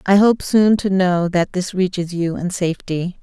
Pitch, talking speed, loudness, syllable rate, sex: 185 Hz, 205 wpm, -18 LUFS, 4.5 syllables/s, female